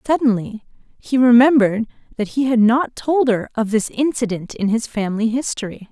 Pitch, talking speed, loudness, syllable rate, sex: 235 Hz, 160 wpm, -18 LUFS, 5.2 syllables/s, female